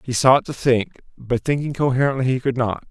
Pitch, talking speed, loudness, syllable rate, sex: 130 Hz, 205 wpm, -20 LUFS, 5.6 syllables/s, male